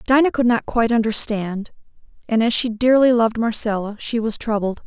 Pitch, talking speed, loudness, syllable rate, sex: 230 Hz, 175 wpm, -18 LUFS, 5.5 syllables/s, female